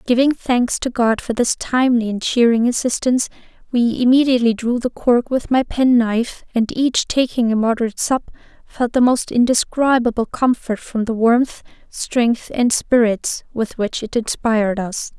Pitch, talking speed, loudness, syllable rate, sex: 240 Hz, 160 wpm, -18 LUFS, 4.7 syllables/s, female